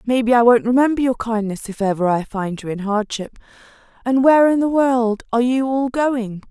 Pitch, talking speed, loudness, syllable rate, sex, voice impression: 235 Hz, 205 wpm, -18 LUFS, 5.3 syllables/s, female, feminine, slightly adult-like, slightly intellectual, calm